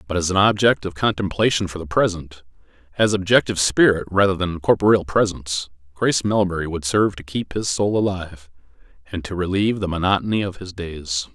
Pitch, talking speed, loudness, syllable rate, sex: 90 Hz, 175 wpm, -20 LUFS, 5.9 syllables/s, male